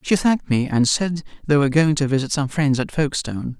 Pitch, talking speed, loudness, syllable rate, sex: 145 Hz, 235 wpm, -20 LUFS, 6.1 syllables/s, male